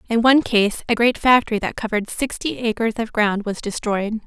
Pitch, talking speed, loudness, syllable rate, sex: 225 Hz, 195 wpm, -19 LUFS, 5.5 syllables/s, female